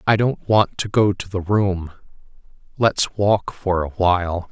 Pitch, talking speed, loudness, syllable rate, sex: 95 Hz, 175 wpm, -20 LUFS, 3.9 syllables/s, male